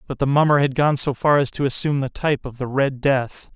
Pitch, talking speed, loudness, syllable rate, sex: 135 Hz, 270 wpm, -19 LUFS, 5.9 syllables/s, male